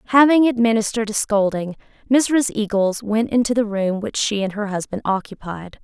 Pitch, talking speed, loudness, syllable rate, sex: 215 Hz, 165 wpm, -19 LUFS, 5.2 syllables/s, female